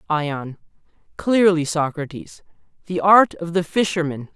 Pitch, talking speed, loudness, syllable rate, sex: 165 Hz, 110 wpm, -19 LUFS, 4.2 syllables/s, male